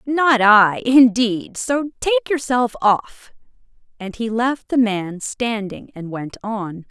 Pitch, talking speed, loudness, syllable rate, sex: 230 Hz, 140 wpm, -18 LUFS, 3.3 syllables/s, female